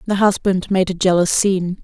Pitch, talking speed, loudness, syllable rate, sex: 185 Hz, 195 wpm, -17 LUFS, 5.3 syllables/s, female